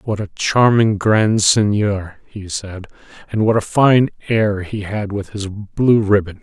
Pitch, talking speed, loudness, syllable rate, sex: 105 Hz, 170 wpm, -17 LUFS, 3.8 syllables/s, male